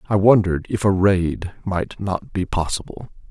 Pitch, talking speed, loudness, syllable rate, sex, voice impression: 95 Hz, 165 wpm, -20 LUFS, 4.6 syllables/s, male, masculine, adult-like, thick, tensed, slightly powerful, soft, slightly halting, cool, calm, friendly, reassuring, wild, kind, slightly modest